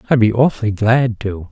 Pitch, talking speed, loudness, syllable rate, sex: 115 Hz, 200 wpm, -16 LUFS, 5.3 syllables/s, male